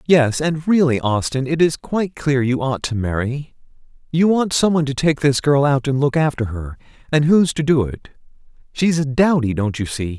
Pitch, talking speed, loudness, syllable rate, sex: 140 Hz, 205 wpm, -18 LUFS, 5.0 syllables/s, male